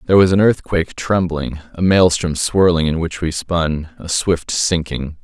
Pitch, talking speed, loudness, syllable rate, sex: 85 Hz, 170 wpm, -17 LUFS, 4.5 syllables/s, male